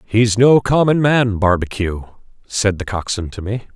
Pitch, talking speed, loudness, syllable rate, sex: 110 Hz, 160 wpm, -16 LUFS, 4.2 syllables/s, male